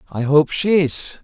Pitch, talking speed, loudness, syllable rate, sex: 155 Hz, 195 wpm, -17 LUFS, 4.0 syllables/s, male